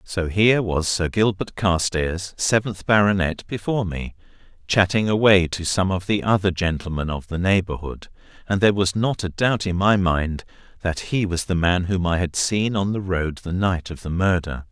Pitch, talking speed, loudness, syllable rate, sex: 95 Hz, 190 wpm, -21 LUFS, 4.8 syllables/s, male